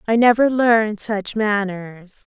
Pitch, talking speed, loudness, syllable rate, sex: 215 Hz, 130 wpm, -18 LUFS, 3.8 syllables/s, female